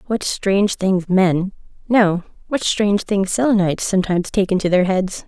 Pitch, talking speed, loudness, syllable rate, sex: 195 Hz, 150 wpm, -18 LUFS, 5.1 syllables/s, female